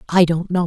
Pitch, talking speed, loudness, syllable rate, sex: 175 Hz, 270 wpm, -17 LUFS, 5.6 syllables/s, female